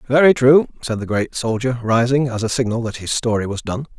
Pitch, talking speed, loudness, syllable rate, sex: 120 Hz, 225 wpm, -18 LUFS, 5.6 syllables/s, male